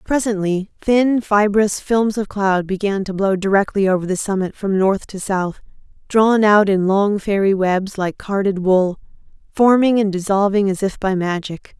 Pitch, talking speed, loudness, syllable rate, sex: 200 Hz, 170 wpm, -17 LUFS, 4.4 syllables/s, female